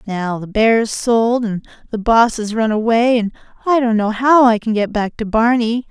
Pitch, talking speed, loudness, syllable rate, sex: 225 Hz, 215 wpm, -15 LUFS, 4.4 syllables/s, female